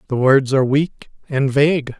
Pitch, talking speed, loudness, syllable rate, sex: 140 Hz, 180 wpm, -17 LUFS, 5.0 syllables/s, male